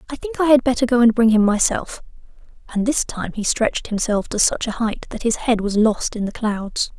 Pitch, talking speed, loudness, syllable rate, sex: 225 Hz, 240 wpm, -19 LUFS, 5.4 syllables/s, female